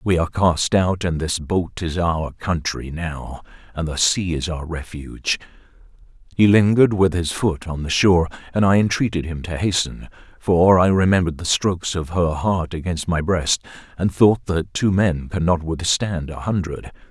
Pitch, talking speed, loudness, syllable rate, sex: 85 Hz, 175 wpm, -20 LUFS, 4.7 syllables/s, male